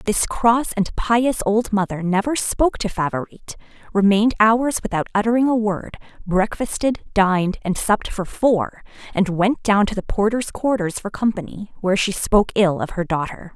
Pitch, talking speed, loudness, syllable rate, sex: 205 Hz, 170 wpm, -20 LUFS, 5.0 syllables/s, female